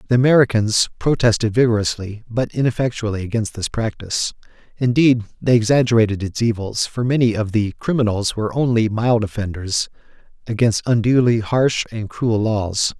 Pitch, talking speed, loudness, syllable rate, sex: 115 Hz, 135 wpm, -19 LUFS, 5.3 syllables/s, male